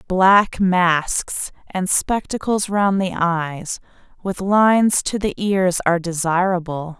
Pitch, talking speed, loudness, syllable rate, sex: 185 Hz, 120 wpm, -18 LUFS, 3.4 syllables/s, female